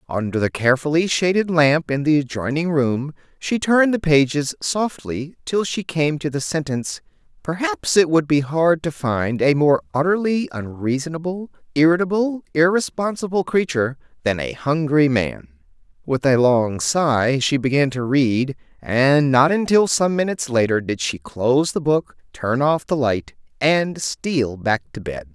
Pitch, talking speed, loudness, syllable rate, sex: 145 Hz, 155 wpm, -19 LUFS, 4.5 syllables/s, male